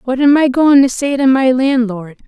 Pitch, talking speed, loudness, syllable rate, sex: 260 Hz, 240 wpm, -12 LUFS, 4.8 syllables/s, female